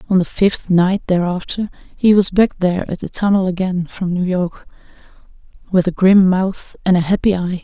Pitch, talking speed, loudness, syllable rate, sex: 185 Hz, 180 wpm, -16 LUFS, 4.9 syllables/s, female